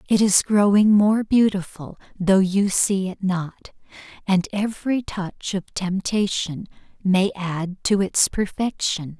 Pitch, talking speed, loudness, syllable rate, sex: 195 Hz, 130 wpm, -21 LUFS, 3.7 syllables/s, female